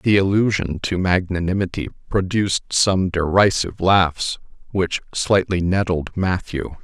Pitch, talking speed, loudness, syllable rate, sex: 90 Hz, 105 wpm, -20 LUFS, 4.3 syllables/s, male